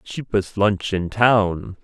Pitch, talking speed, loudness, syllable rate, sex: 100 Hz, 130 wpm, -20 LUFS, 2.9 syllables/s, male